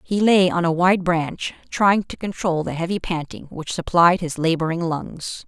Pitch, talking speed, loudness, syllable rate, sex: 175 Hz, 185 wpm, -20 LUFS, 4.4 syllables/s, female